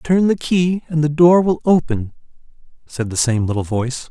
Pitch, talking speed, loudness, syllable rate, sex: 150 Hz, 190 wpm, -17 LUFS, 4.9 syllables/s, male